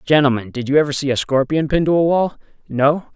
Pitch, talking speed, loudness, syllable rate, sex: 145 Hz, 230 wpm, -17 LUFS, 6.3 syllables/s, male